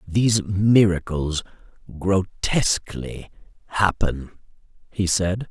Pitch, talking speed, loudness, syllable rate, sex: 95 Hz, 45 wpm, -22 LUFS, 3.4 syllables/s, male